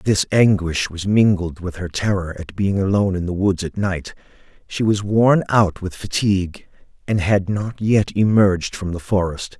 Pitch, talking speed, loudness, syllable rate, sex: 95 Hz, 180 wpm, -19 LUFS, 4.6 syllables/s, male